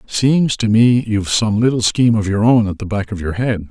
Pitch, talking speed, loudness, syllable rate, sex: 110 Hz, 260 wpm, -15 LUFS, 5.4 syllables/s, male